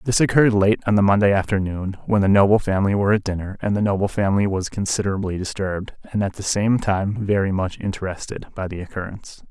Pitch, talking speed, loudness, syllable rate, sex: 100 Hz, 200 wpm, -21 LUFS, 6.5 syllables/s, male